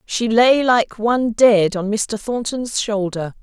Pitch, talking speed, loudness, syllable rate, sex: 220 Hz, 155 wpm, -17 LUFS, 3.7 syllables/s, female